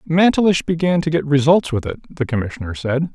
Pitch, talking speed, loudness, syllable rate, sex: 150 Hz, 190 wpm, -18 LUFS, 5.8 syllables/s, male